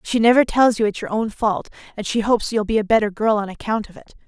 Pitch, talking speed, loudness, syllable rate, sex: 215 Hz, 280 wpm, -19 LUFS, 6.5 syllables/s, female